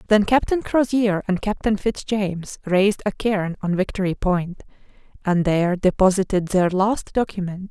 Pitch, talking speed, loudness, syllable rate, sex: 195 Hz, 150 wpm, -21 LUFS, 4.7 syllables/s, female